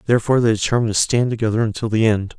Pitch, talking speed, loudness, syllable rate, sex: 110 Hz, 225 wpm, -18 LUFS, 8.1 syllables/s, male